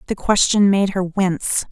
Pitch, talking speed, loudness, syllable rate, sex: 190 Hz, 175 wpm, -17 LUFS, 4.7 syllables/s, female